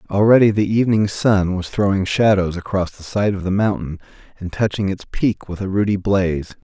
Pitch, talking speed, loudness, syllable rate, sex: 100 Hz, 190 wpm, -18 LUFS, 5.3 syllables/s, male